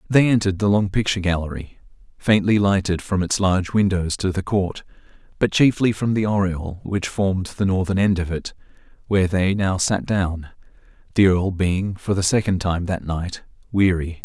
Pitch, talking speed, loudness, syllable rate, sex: 95 Hz, 175 wpm, -21 LUFS, 5.0 syllables/s, male